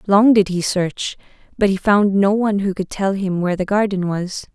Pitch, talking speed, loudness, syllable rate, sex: 195 Hz, 225 wpm, -18 LUFS, 5.1 syllables/s, female